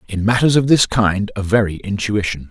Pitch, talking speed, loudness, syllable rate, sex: 105 Hz, 190 wpm, -16 LUFS, 5.3 syllables/s, male